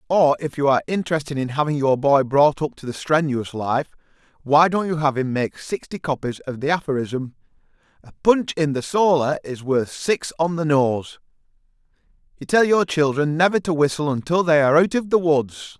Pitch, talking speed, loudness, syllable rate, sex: 150 Hz, 195 wpm, -20 LUFS, 5.2 syllables/s, male